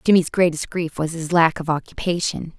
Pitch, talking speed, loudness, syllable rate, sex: 165 Hz, 185 wpm, -21 LUFS, 5.3 syllables/s, female